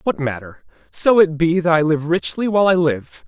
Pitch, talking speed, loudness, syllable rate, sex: 165 Hz, 220 wpm, -17 LUFS, 5.2 syllables/s, male